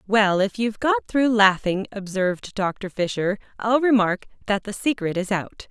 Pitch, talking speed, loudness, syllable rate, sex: 210 Hz, 170 wpm, -22 LUFS, 4.6 syllables/s, female